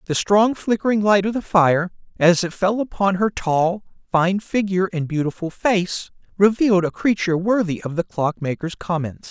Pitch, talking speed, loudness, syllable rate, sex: 185 Hz, 170 wpm, -20 LUFS, 4.9 syllables/s, male